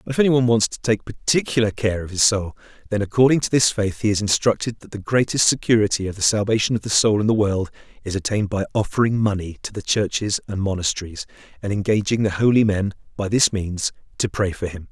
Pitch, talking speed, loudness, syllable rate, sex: 105 Hz, 215 wpm, -20 LUFS, 6.2 syllables/s, male